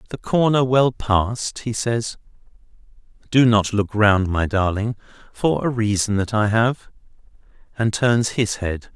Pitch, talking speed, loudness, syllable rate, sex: 110 Hz, 145 wpm, -20 LUFS, 4.1 syllables/s, male